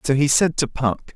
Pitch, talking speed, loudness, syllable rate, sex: 140 Hz, 260 wpm, -19 LUFS, 5.4 syllables/s, male